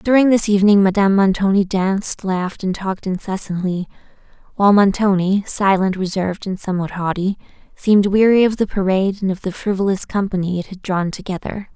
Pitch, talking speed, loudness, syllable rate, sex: 195 Hz, 160 wpm, -18 LUFS, 6.0 syllables/s, female